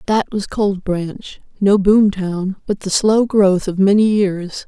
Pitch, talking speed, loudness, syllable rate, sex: 195 Hz, 165 wpm, -16 LUFS, 3.6 syllables/s, female